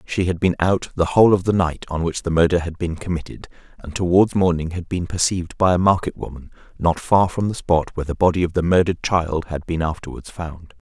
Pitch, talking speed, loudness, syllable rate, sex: 85 Hz, 230 wpm, -20 LUFS, 5.8 syllables/s, male